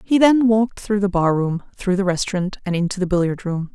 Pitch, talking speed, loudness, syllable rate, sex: 195 Hz, 225 wpm, -19 LUFS, 5.8 syllables/s, female